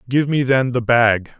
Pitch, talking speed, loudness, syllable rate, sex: 125 Hz, 215 wpm, -16 LUFS, 4.5 syllables/s, male